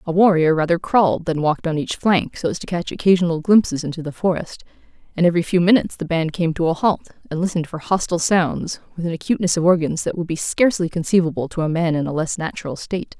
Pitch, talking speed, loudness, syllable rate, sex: 170 Hz, 230 wpm, -19 LUFS, 6.7 syllables/s, female